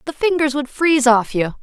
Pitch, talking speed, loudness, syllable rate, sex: 275 Hz, 220 wpm, -17 LUFS, 5.6 syllables/s, female